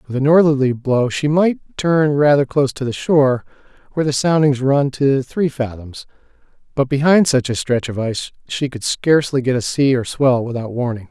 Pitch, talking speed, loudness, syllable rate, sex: 135 Hz, 195 wpm, -17 LUFS, 5.3 syllables/s, male